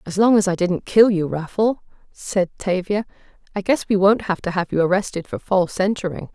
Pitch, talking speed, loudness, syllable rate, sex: 190 Hz, 210 wpm, -20 LUFS, 5.5 syllables/s, female